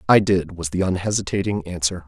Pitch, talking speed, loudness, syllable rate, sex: 90 Hz, 175 wpm, -21 LUFS, 5.8 syllables/s, male